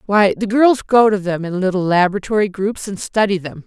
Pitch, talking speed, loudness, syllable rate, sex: 200 Hz, 215 wpm, -16 LUFS, 5.5 syllables/s, female